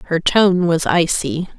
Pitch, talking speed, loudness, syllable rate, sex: 175 Hz, 150 wpm, -16 LUFS, 3.8 syllables/s, female